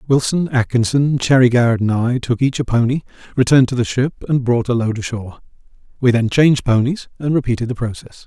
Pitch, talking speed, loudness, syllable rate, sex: 125 Hz, 195 wpm, -17 LUFS, 6.1 syllables/s, male